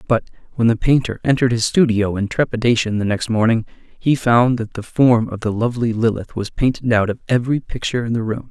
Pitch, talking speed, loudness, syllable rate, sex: 115 Hz, 210 wpm, -18 LUFS, 5.9 syllables/s, male